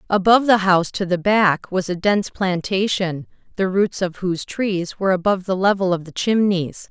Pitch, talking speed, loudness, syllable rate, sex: 190 Hz, 190 wpm, -19 LUFS, 5.3 syllables/s, female